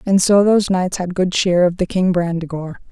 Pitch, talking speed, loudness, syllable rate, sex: 180 Hz, 225 wpm, -16 LUFS, 5.6 syllables/s, female